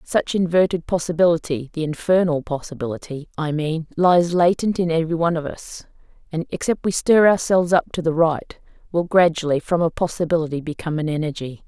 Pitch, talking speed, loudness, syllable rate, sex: 165 Hz, 165 wpm, -20 LUFS, 5.8 syllables/s, female